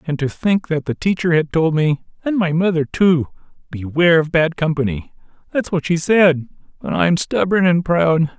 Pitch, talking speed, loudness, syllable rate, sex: 165 Hz, 170 wpm, -17 LUFS, 4.9 syllables/s, male